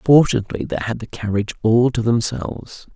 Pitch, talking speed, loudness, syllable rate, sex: 115 Hz, 165 wpm, -19 LUFS, 5.9 syllables/s, male